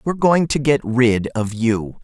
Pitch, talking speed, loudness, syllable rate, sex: 125 Hz, 205 wpm, -18 LUFS, 4.2 syllables/s, male